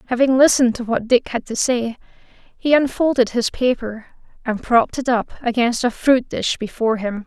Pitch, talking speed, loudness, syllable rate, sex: 240 Hz, 180 wpm, -18 LUFS, 5.3 syllables/s, female